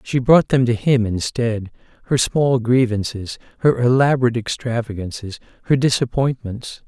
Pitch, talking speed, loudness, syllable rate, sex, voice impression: 120 Hz, 120 wpm, -18 LUFS, 4.8 syllables/s, male, masculine, middle-aged, tensed, slightly weak, soft, cool, intellectual, calm, mature, friendly, reassuring, wild, lively, kind